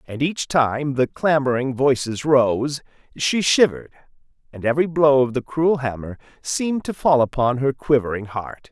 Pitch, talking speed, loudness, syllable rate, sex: 135 Hz, 160 wpm, -20 LUFS, 4.6 syllables/s, male